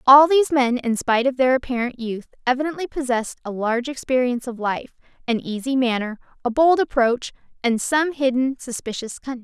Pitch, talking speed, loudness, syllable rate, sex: 255 Hz, 170 wpm, -21 LUFS, 5.8 syllables/s, female